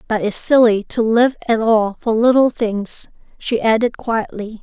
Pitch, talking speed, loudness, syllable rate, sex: 225 Hz, 170 wpm, -16 LUFS, 4.2 syllables/s, female